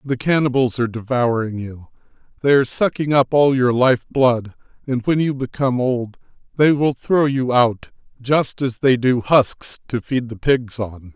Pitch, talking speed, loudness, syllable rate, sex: 125 Hz, 175 wpm, -18 LUFS, 4.5 syllables/s, male